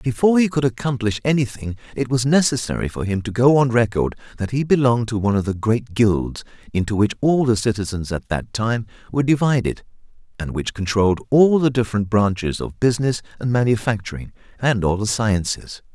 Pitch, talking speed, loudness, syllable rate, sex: 115 Hz, 180 wpm, -20 LUFS, 5.7 syllables/s, male